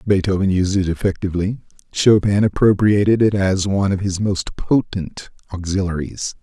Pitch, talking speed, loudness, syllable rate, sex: 95 Hz, 130 wpm, -18 LUFS, 5.1 syllables/s, male